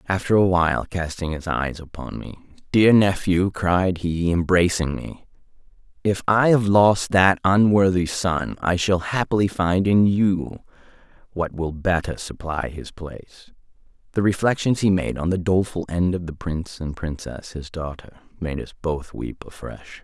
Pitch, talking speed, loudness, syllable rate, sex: 90 Hz, 160 wpm, -21 LUFS, 4.4 syllables/s, male